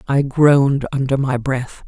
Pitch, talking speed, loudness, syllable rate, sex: 135 Hz, 160 wpm, -17 LUFS, 4.2 syllables/s, female